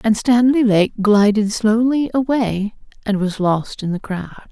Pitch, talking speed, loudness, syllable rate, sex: 215 Hz, 160 wpm, -17 LUFS, 4.0 syllables/s, female